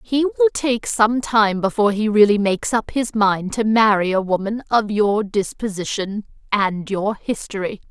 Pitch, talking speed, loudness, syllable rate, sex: 210 Hz, 160 wpm, -19 LUFS, 4.6 syllables/s, female